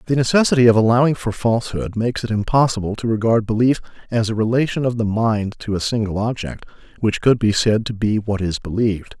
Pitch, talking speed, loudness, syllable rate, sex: 115 Hz, 200 wpm, -19 LUFS, 6.0 syllables/s, male